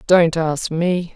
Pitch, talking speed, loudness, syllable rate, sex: 170 Hz, 155 wpm, -18 LUFS, 3.0 syllables/s, female